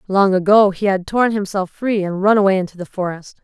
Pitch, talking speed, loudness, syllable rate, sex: 195 Hz, 225 wpm, -17 LUFS, 5.5 syllables/s, female